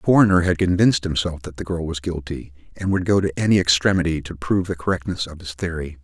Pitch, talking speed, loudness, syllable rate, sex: 85 Hz, 230 wpm, -21 LUFS, 6.6 syllables/s, male